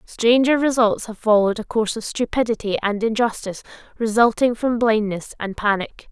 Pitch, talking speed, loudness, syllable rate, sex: 220 Hz, 145 wpm, -20 LUFS, 5.4 syllables/s, female